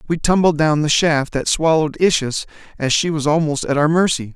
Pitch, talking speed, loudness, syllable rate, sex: 155 Hz, 205 wpm, -17 LUFS, 5.5 syllables/s, male